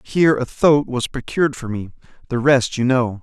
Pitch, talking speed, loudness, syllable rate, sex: 130 Hz, 185 wpm, -18 LUFS, 5.1 syllables/s, male